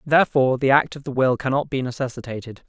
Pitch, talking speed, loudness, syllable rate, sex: 130 Hz, 200 wpm, -21 LUFS, 6.6 syllables/s, male